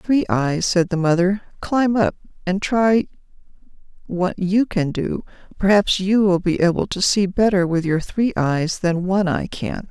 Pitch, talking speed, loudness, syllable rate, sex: 190 Hz, 175 wpm, -19 LUFS, 4.3 syllables/s, female